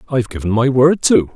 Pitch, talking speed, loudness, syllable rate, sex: 125 Hz, 265 wpm, -15 LUFS, 6.0 syllables/s, male